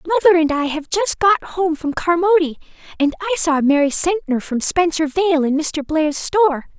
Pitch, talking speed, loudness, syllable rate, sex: 330 Hz, 185 wpm, -17 LUFS, 5.3 syllables/s, female